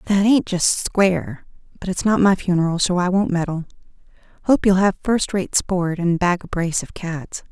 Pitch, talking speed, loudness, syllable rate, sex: 185 Hz, 200 wpm, -19 LUFS, 4.9 syllables/s, female